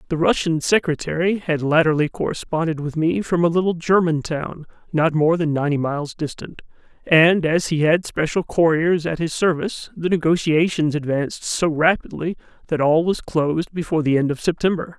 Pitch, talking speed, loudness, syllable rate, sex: 160 Hz, 170 wpm, -20 LUFS, 5.4 syllables/s, male